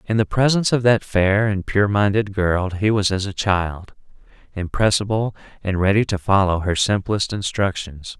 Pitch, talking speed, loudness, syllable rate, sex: 100 Hz, 170 wpm, -19 LUFS, 4.7 syllables/s, male